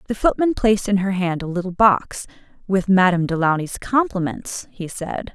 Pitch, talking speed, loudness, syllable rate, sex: 190 Hz, 180 wpm, -20 LUFS, 5.1 syllables/s, female